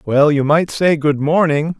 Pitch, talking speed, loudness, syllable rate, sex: 155 Hz, 200 wpm, -15 LUFS, 4.2 syllables/s, male